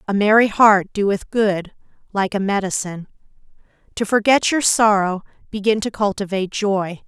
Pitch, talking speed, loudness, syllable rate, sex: 205 Hz, 135 wpm, -18 LUFS, 4.8 syllables/s, female